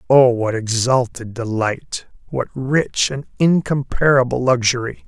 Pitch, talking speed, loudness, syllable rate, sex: 125 Hz, 95 wpm, -18 LUFS, 4.0 syllables/s, male